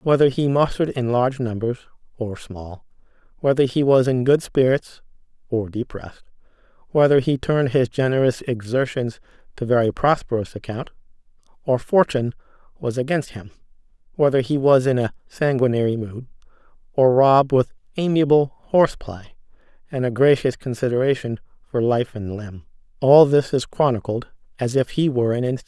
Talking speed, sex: 145 wpm, male